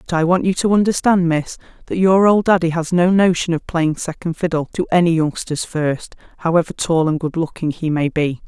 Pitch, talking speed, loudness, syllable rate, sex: 170 Hz, 210 wpm, -17 LUFS, 5.4 syllables/s, female